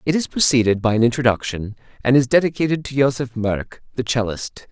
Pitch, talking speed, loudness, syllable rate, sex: 125 Hz, 180 wpm, -19 LUFS, 5.8 syllables/s, male